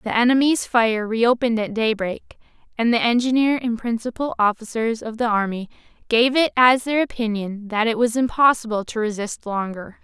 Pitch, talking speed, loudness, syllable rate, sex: 230 Hz, 160 wpm, -20 LUFS, 5.1 syllables/s, female